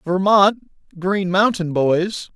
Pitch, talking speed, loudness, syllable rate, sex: 185 Hz, 100 wpm, -18 LUFS, 3.1 syllables/s, male